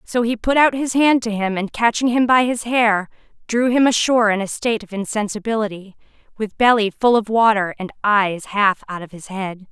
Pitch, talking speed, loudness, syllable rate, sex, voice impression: 220 Hz, 210 wpm, -18 LUFS, 5.2 syllables/s, female, feminine, adult-like, clear, slightly cute, slightly sincere, slightly lively